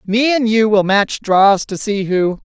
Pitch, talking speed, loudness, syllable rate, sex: 210 Hz, 220 wpm, -14 LUFS, 3.9 syllables/s, female